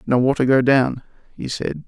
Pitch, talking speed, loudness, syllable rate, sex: 130 Hz, 190 wpm, -18 LUFS, 4.8 syllables/s, male